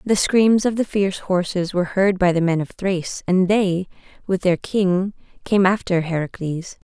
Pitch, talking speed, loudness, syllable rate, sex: 185 Hz, 180 wpm, -20 LUFS, 4.7 syllables/s, female